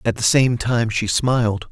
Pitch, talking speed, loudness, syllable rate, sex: 115 Hz, 210 wpm, -18 LUFS, 4.4 syllables/s, male